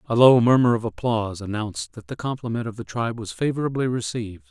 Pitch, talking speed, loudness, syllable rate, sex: 115 Hz, 200 wpm, -23 LUFS, 6.5 syllables/s, male